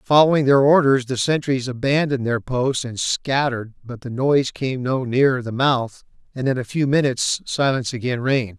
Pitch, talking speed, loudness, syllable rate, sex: 130 Hz, 180 wpm, -20 LUFS, 5.3 syllables/s, male